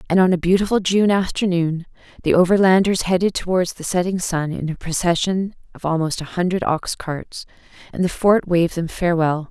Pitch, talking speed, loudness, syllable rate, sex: 175 Hz, 175 wpm, -19 LUFS, 5.4 syllables/s, female